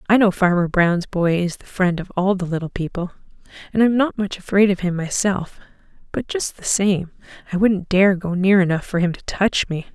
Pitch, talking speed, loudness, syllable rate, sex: 185 Hz, 215 wpm, -19 LUFS, 5.2 syllables/s, female